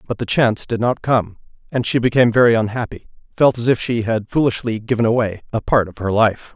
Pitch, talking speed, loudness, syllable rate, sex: 115 Hz, 210 wpm, -18 LUFS, 6.0 syllables/s, male